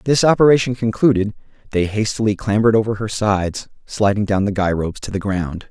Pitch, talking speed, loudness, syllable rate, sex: 105 Hz, 180 wpm, -18 LUFS, 6.0 syllables/s, male